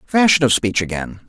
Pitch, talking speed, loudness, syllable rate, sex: 130 Hz, 190 wpm, -16 LUFS, 5.6 syllables/s, male